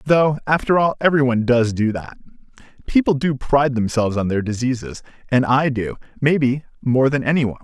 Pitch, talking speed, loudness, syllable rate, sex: 130 Hz, 175 wpm, -19 LUFS, 5.7 syllables/s, male